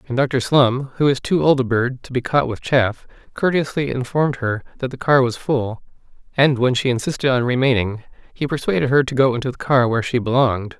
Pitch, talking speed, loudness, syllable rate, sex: 130 Hz, 210 wpm, -19 LUFS, 5.7 syllables/s, male